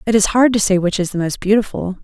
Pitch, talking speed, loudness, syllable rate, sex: 200 Hz, 295 wpm, -16 LUFS, 6.4 syllables/s, female